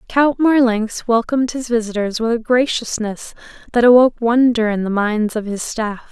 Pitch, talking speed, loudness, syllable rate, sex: 230 Hz, 165 wpm, -17 LUFS, 5.0 syllables/s, female